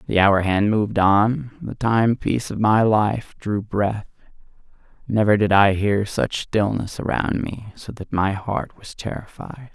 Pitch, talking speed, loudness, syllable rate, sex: 105 Hz, 155 wpm, -20 LUFS, 4.1 syllables/s, male